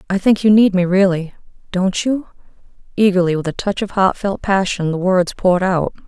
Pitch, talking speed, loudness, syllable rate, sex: 190 Hz, 190 wpm, -16 LUFS, 5.2 syllables/s, female